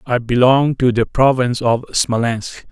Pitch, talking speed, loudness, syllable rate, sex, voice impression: 125 Hz, 155 wpm, -16 LUFS, 4.4 syllables/s, male, masculine, slightly old, slightly halting, slightly intellectual, sincere, calm, slightly mature, slightly wild